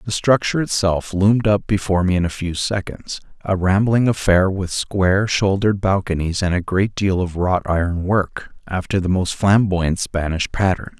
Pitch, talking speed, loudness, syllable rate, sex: 95 Hz, 175 wpm, -19 LUFS, 4.9 syllables/s, male